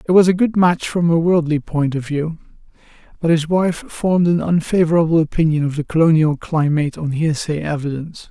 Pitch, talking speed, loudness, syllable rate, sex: 160 Hz, 180 wpm, -17 LUFS, 5.6 syllables/s, male